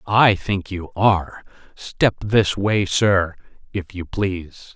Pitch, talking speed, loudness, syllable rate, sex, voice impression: 95 Hz, 140 wpm, -20 LUFS, 3.4 syllables/s, male, very masculine, adult-like, middle-aged, thick, slightly relaxed, slightly weak, very bright, soft, very clear, fluent, cool, very intellectual, slightly refreshing, sincere, calm, very mature, friendly, very reassuring, unique, elegant, slightly wild, very sweet, slightly lively, very kind, modest